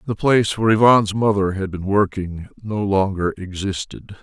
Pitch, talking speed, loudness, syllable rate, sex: 100 Hz, 155 wpm, -19 LUFS, 4.9 syllables/s, male